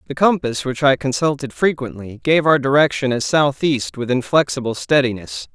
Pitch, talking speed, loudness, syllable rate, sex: 130 Hz, 150 wpm, -18 LUFS, 5.1 syllables/s, male